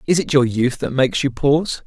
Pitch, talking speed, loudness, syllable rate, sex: 140 Hz, 260 wpm, -18 LUFS, 5.9 syllables/s, male